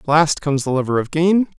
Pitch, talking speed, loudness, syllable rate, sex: 155 Hz, 225 wpm, -18 LUFS, 5.7 syllables/s, male